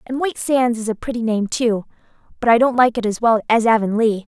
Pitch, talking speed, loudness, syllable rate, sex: 230 Hz, 235 wpm, -18 LUFS, 5.9 syllables/s, female